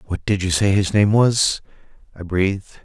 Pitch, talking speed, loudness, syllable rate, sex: 100 Hz, 190 wpm, -18 LUFS, 4.6 syllables/s, male